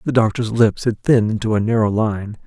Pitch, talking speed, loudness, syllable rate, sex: 110 Hz, 220 wpm, -18 LUFS, 5.7 syllables/s, male